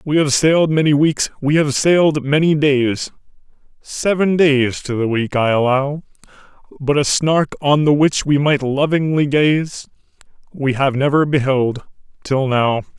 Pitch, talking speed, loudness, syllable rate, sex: 145 Hz, 155 wpm, -16 LUFS, 3.7 syllables/s, male